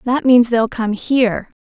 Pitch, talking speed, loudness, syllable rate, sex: 235 Hz, 185 wpm, -15 LUFS, 4.3 syllables/s, female